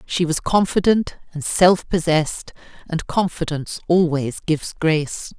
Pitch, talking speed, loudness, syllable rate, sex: 165 Hz, 125 wpm, -20 LUFS, 4.6 syllables/s, female